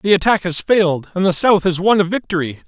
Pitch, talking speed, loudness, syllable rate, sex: 185 Hz, 245 wpm, -16 LUFS, 5.9 syllables/s, male